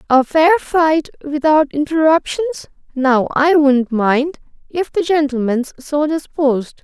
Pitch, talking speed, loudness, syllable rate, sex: 295 Hz, 125 wpm, -16 LUFS, 3.9 syllables/s, female